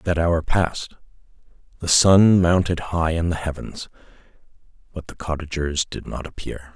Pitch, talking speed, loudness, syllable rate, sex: 80 Hz, 140 wpm, -21 LUFS, 4.6 syllables/s, male